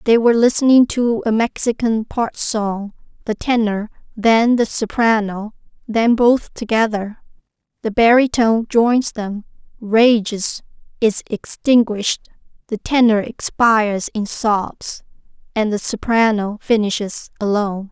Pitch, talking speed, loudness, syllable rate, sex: 220 Hz, 110 wpm, -17 LUFS, 4.1 syllables/s, female